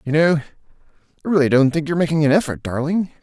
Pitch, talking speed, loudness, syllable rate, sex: 155 Hz, 205 wpm, -18 LUFS, 7.1 syllables/s, male